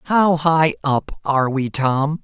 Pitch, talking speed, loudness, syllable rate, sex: 150 Hz, 160 wpm, -18 LUFS, 3.8 syllables/s, male